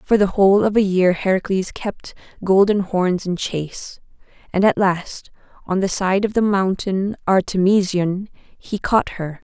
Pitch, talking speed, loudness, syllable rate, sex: 190 Hz, 160 wpm, -19 LUFS, 4.3 syllables/s, female